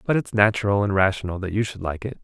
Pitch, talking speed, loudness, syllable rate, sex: 100 Hz, 270 wpm, -22 LUFS, 6.8 syllables/s, male